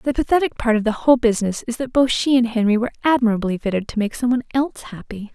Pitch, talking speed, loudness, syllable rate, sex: 235 Hz, 245 wpm, -19 LUFS, 7.3 syllables/s, female